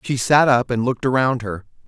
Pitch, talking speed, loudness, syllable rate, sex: 125 Hz, 225 wpm, -18 LUFS, 5.7 syllables/s, male